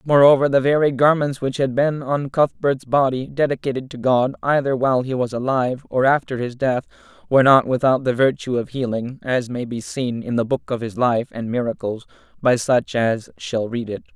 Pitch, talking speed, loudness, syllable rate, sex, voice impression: 130 Hz, 200 wpm, -20 LUFS, 5.2 syllables/s, male, very masculine, adult-like, slightly middle-aged, thick, tensed, slightly powerful, slightly dark, very hard, clear, slightly halting, slightly raspy, slightly cool, very intellectual, slightly refreshing, sincere, very calm, slightly mature, unique, elegant, slightly kind, slightly modest